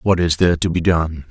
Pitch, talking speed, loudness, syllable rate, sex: 85 Hz, 275 wpm, -17 LUFS, 5.7 syllables/s, male